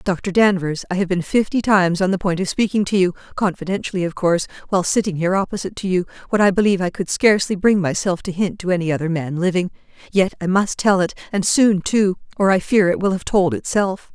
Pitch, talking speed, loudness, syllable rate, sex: 185 Hz, 220 wpm, -19 LUFS, 6.2 syllables/s, female